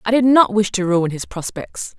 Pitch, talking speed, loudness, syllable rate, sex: 205 Hz, 240 wpm, -17 LUFS, 4.8 syllables/s, female